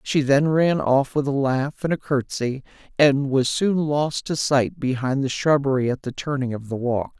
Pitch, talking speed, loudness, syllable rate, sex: 140 Hz, 210 wpm, -22 LUFS, 4.6 syllables/s, male